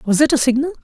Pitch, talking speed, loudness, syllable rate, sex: 270 Hz, 285 wpm, -15 LUFS, 6.9 syllables/s, female